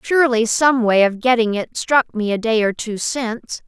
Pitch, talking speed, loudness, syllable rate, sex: 230 Hz, 210 wpm, -17 LUFS, 4.8 syllables/s, female